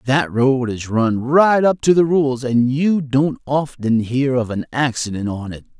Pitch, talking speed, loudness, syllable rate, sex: 130 Hz, 195 wpm, -17 LUFS, 4.1 syllables/s, male